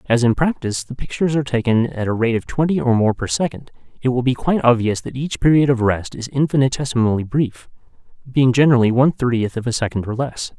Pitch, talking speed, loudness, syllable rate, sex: 125 Hz, 215 wpm, -18 LUFS, 6.4 syllables/s, male